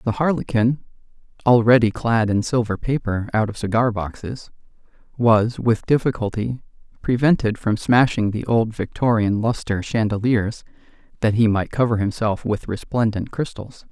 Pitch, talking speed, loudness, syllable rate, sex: 115 Hz, 130 wpm, -20 LUFS, 4.7 syllables/s, male